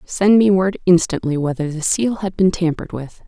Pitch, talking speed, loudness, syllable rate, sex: 180 Hz, 200 wpm, -17 LUFS, 5.1 syllables/s, female